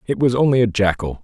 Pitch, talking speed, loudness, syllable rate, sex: 115 Hz, 240 wpm, -17 LUFS, 6.4 syllables/s, male